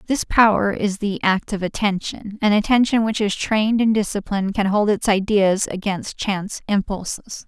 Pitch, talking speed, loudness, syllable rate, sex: 205 Hz, 170 wpm, -20 LUFS, 4.9 syllables/s, female